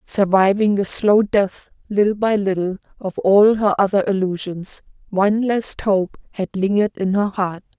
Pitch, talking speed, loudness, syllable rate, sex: 200 Hz, 155 wpm, -18 LUFS, 4.5 syllables/s, female